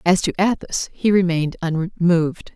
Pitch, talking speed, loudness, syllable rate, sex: 175 Hz, 140 wpm, -20 LUFS, 4.7 syllables/s, female